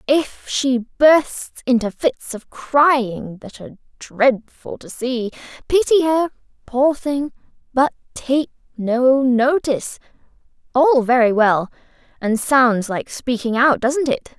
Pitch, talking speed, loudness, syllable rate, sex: 255 Hz, 125 wpm, -18 LUFS, 3.6 syllables/s, female